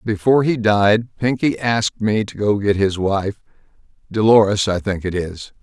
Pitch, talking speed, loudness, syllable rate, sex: 105 Hz, 160 wpm, -18 LUFS, 4.7 syllables/s, male